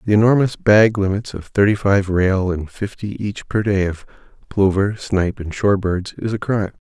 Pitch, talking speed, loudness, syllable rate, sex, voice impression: 100 Hz, 190 wpm, -18 LUFS, 5.0 syllables/s, male, masculine, adult-like, slightly soft, sincere, friendly, kind